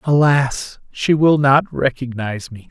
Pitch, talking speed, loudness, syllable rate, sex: 130 Hz, 135 wpm, -16 LUFS, 4.0 syllables/s, male